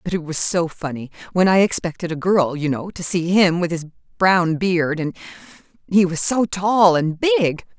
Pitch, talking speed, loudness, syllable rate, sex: 175 Hz, 200 wpm, -19 LUFS, 4.6 syllables/s, female